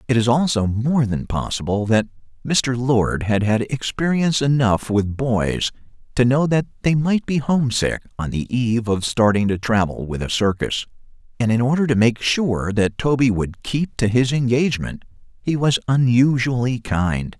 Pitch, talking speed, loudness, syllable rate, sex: 120 Hz, 170 wpm, -19 LUFS, 4.7 syllables/s, male